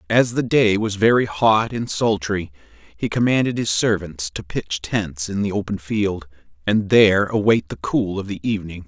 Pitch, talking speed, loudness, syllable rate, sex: 100 Hz, 185 wpm, -20 LUFS, 4.6 syllables/s, male